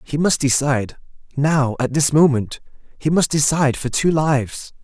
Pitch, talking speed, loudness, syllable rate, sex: 140 Hz, 135 wpm, -18 LUFS, 5.0 syllables/s, male